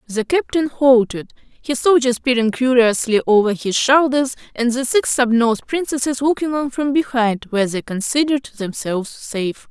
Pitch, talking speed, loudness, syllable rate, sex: 250 Hz, 150 wpm, -17 LUFS, 5.0 syllables/s, female